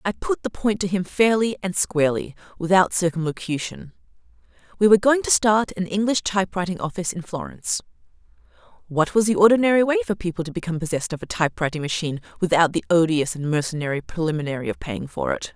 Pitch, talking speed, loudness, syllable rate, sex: 180 Hz, 175 wpm, -22 LUFS, 6.5 syllables/s, female